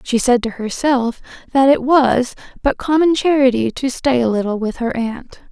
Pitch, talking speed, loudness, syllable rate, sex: 250 Hz, 185 wpm, -16 LUFS, 4.6 syllables/s, female